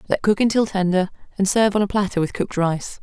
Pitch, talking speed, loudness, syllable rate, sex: 195 Hz, 240 wpm, -20 LUFS, 6.6 syllables/s, female